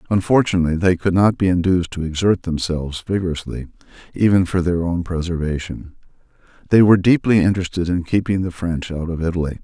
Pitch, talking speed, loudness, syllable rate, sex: 90 Hz, 160 wpm, -18 LUFS, 6.3 syllables/s, male